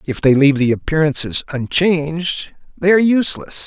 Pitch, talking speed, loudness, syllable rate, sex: 160 Hz, 150 wpm, -16 LUFS, 5.4 syllables/s, male